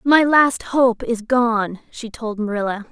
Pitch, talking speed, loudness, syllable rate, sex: 235 Hz, 165 wpm, -18 LUFS, 3.7 syllables/s, female